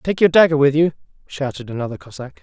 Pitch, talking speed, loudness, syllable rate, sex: 145 Hz, 200 wpm, -17 LUFS, 6.3 syllables/s, male